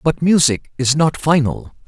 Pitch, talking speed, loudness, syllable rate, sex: 145 Hz, 160 wpm, -16 LUFS, 4.3 syllables/s, male